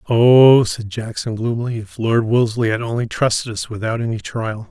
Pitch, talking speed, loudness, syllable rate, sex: 115 Hz, 180 wpm, -17 LUFS, 5.1 syllables/s, male